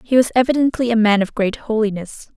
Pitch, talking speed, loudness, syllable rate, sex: 225 Hz, 200 wpm, -17 LUFS, 6.0 syllables/s, female